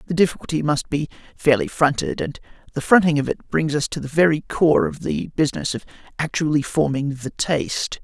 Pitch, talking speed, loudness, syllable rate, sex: 145 Hz, 185 wpm, -21 LUFS, 5.5 syllables/s, male